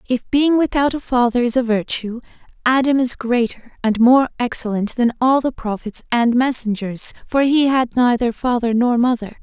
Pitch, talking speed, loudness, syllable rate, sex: 245 Hz, 170 wpm, -17 LUFS, 4.8 syllables/s, female